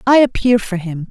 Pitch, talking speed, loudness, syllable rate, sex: 215 Hz, 220 wpm, -15 LUFS, 5.1 syllables/s, female